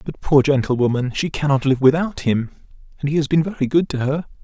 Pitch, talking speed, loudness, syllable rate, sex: 140 Hz, 215 wpm, -19 LUFS, 6.0 syllables/s, male